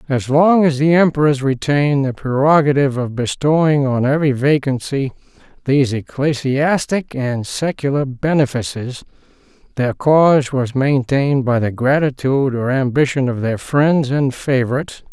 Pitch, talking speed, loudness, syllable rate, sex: 135 Hz, 125 wpm, -16 LUFS, 4.9 syllables/s, male